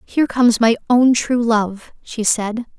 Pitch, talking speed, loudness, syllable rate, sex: 230 Hz, 170 wpm, -16 LUFS, 4.3 syllables/s, female